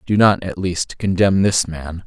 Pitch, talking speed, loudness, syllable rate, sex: 95 Hz, 205 wpm, -18 LUFS, 4.1 syllables/s, male